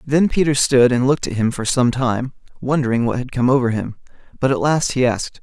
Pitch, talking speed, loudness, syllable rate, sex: 130 Hz, 230 wpm, -18 LUFS, 5.8 syllables/s, male